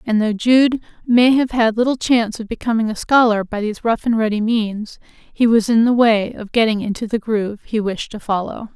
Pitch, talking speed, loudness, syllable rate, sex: 225 Hz, 220 wpm, -17 LUFS, 5.2 syllables/s, female